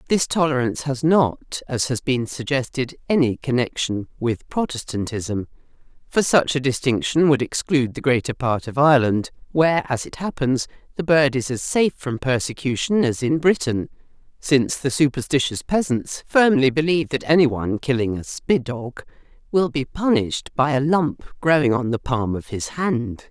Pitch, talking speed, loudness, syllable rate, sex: 135 Hz, 155 wpm, -21 LUFS, 4.9 syllables/s, female